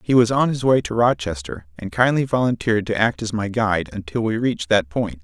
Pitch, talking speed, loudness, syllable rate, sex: 105 Hz, 230 wpm, -20 LUFS, 5.8 syllables/s, male